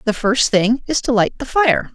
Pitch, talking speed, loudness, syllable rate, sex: 240 Hz, 245 wpm, -16 LUFS, 4.6 syllables/s, female